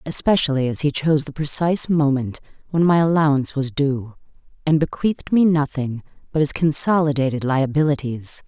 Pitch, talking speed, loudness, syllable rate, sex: 145 Hz, 140 wpm, -19 LUFS, 5.5 syllables/s, female